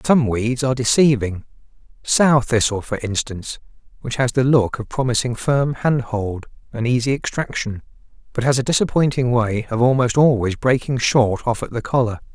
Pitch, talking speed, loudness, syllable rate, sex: 125 Hz, 160 wpm, -19 LUFS, 5.0 syllables/s, male